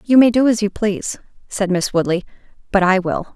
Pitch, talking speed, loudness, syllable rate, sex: 205 Hz, 215 wpm, -17 LUFS, 5.8 syllables/s, female